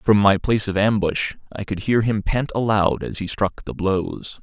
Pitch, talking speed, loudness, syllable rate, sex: 105 Hz, 215 wpm, -21 LUFS, 4.5 syllables/s, male